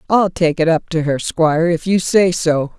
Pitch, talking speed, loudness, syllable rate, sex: 170 Hz, 235 wpm, -16 LUFS, 4.7 syllables/s, female